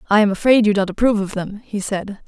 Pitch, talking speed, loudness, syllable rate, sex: 205 Hz, 265 wpm, -18 LUFS, 6.3 syllables/s, female